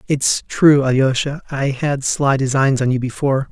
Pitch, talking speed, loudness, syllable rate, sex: 135 Hz, 170 wpm, -17 LUFS, 4.7 syllables/s, male